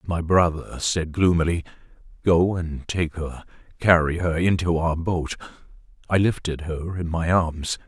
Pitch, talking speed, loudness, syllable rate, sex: 85 Hz, 145 wpm, -23 LUFS, 4.1 syllables/s, male